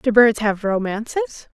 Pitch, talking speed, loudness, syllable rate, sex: 215 Hz, 150 wpm, -20 LUFS, 4.1 syllables/s, female